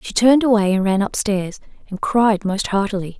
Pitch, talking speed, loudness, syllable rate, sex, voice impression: 205 Hz, 205 wpm, -18 LUFS, 5.4 syllables/s, female, slightly feminine, young, slightly soft, slightly cute, friendly, slightly kind